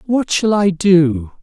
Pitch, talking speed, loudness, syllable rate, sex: 180 Hz, 170 wpm, -14 LUFS, 3.2 syllables/s, male